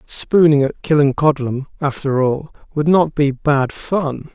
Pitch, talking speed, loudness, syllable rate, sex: 145 Hz, 140 wpm, -17 LUFS, 4.2 syllables/s, male